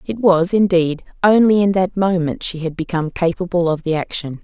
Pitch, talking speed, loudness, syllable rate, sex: 175 Hz, 190 wpm, -17 LUFS, 5.3 syllables/s, female